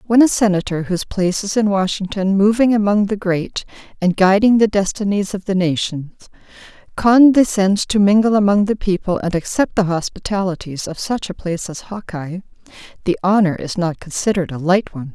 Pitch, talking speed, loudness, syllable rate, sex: 195 Hz, 170 wpm, -17 LUFS, 5.5 syllables/s, female